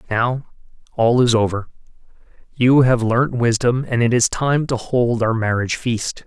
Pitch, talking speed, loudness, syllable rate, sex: 120 Hz, 165 wpm, -18 LUFS, 4.4 syllables/s, male